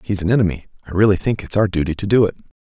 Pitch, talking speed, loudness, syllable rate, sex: 100 Hz, 275 wpm, -18 LUFS, 7.6 syllables/s, male